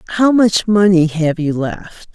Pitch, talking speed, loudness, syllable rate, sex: 180 Hz, 170 wpm, -14 LUFS, 4.1 syllables/s, female